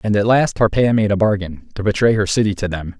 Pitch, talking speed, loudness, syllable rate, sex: 105 Hz, 260 wpm, -17 LUFS, 6.0 syllables/s, male